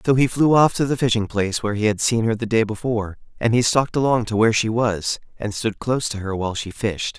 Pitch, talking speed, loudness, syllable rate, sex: 110 Hz, 265 wpm, -20 LUFS, 6.3 syllables/s, male